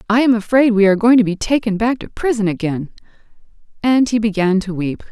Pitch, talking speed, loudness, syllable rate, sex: 215 Hz, 210 wpm, -16 LUFS, 6.0 syllables/s, female